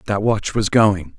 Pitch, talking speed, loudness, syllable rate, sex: 100 Hz, 205 wpm, -18 LUFS, 3.9 syllables/s, male